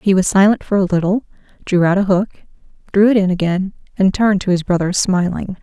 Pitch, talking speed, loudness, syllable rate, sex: 190 Hz, 215 wpm, -16 LUFS, 5.9 syllables/s, female